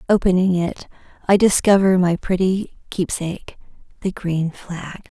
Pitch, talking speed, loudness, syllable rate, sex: 185 Hz, 105 wpm, -19 LUFS, 4.3 syllables/s, female